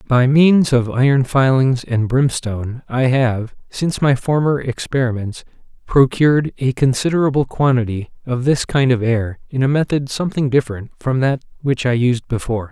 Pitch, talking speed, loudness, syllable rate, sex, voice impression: 130 Hz, 155 wpm, -17 LUFS, 5.0 syllables/s, male, masculine, adult-like, bright, clear, slightly halting, cool, intellectual, slightly refreshing, friendly, lively, kind, slightly modest